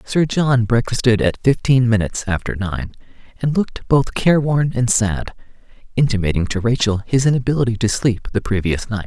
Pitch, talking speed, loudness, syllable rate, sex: 115 Hz, 160 wpm, -18 LUFS, 5.4 syllables/s, male